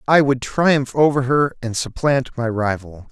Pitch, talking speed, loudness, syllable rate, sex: 130 Hz, 175 wpm, -19 LUFS, 4.1 syllables/s, male